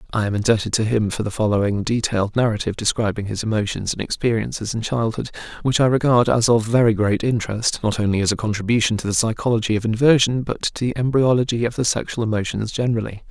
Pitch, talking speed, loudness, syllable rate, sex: 110 Hz, 200 wpm, -20 LUFS, 6.6 syllables/s, male